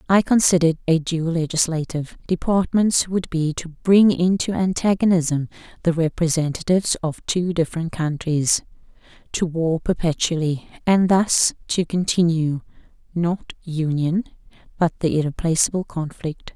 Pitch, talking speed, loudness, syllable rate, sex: 165 Hz, 110 wpm, -21 LUFS, 4.6 syllables/s, female